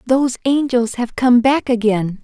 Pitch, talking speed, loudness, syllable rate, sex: 245 Hz, 160 wpm, -16 LUFS, 4.6 syllables/s, female